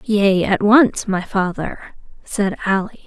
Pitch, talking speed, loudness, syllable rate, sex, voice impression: 200 Hz, 135 wpm, -17 LUFS, 3.5 syllables/s, female, very feminine, slightly young, slightly dark, slightly cute, slightly refreshing, slightly calm